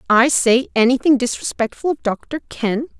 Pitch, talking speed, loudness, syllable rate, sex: 250 Hz, 140 wpm, -18 LUFS, 4.6 syllables/s, female